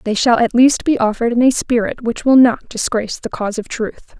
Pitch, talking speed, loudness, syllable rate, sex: 235 Hz, 245 wpm, -15 LUFS, 5.7 syllables/s, female